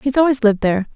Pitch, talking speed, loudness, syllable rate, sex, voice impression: 240 Hz, 250 wpm, -16 LUFS, 8.1 syllables/s, female, feminine, adult-like, slightly relaxed, powerful, soft, slightly muffled, fluent, refreshing, calm, friendly, reassuring, elegant, slightly lively, kind, modest